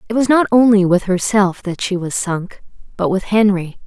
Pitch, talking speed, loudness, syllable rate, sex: 200 Hz, 185 wpm, -16 LUFS, 4.9 syllables/s, female